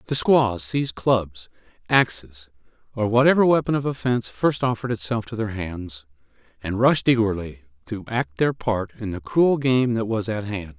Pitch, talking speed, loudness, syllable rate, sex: 110 Hz, 170 wpm, -22 LUFS, 4.8 syllables/s, male